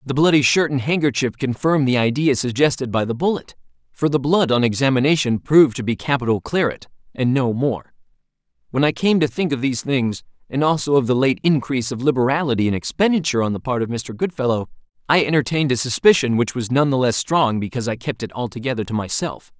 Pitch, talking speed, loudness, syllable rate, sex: 130 Hz, 200 wpm, -19 LUFS, 6.2 syllables/s, male